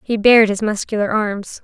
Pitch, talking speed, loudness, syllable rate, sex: 210 Hz, 185 wpm, -16 LUFS, 5.2 syllables/s, female